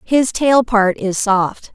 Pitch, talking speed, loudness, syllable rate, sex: 220 Hz, 170 wpm, -15 LUFS, 3.0 syllables/s, female